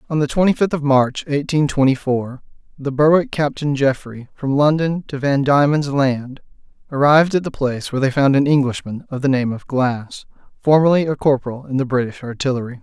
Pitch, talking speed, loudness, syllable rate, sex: 140 Hz, 185 wpm, -18 LUFS, 5.5 syllables/s, male